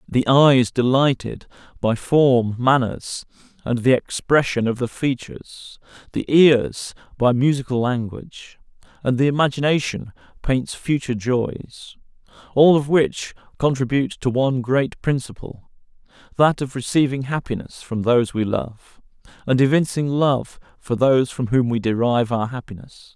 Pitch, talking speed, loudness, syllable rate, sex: 130 Hz, 130 wpm, -20 LUFS, 4.6 syllables/s, male